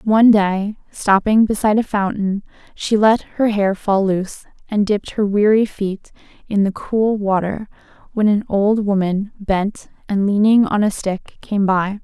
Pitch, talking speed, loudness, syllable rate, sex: 205 Hz, 165 wpm, -17 LUFS, 4.4 syllables/s, female